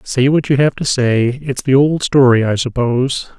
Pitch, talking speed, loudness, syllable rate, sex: 130 Hz, 215 wpm, -14 LUFS, 4.7 syllables/s, male